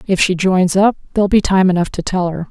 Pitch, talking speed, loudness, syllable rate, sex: 185 Hz, 265 wpm, -15 LUFS, 6.0 syllables/s, female